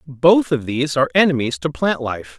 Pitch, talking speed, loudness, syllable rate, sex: 140 Hz, 200 wpm, -18 LUFS, 5.5 syllables/s, male